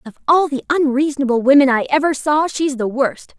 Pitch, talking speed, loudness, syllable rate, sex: 280 Hz, 195 wpm, -16 LUFS, 5.6 syllables/s, female